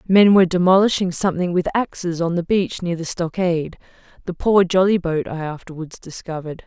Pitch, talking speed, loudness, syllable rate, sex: 175 Hz, 160 wpm, -19 LUFS, 5.7 syllables/s, female